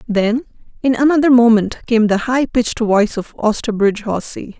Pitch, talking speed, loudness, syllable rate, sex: 230 Hz, 155 wpm, -15 LUFS, 5.4 syllables/s, female